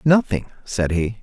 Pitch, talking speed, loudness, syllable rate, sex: 120 Hz, 145 wpm, -21 LUFS, 4.3 syllables/s, male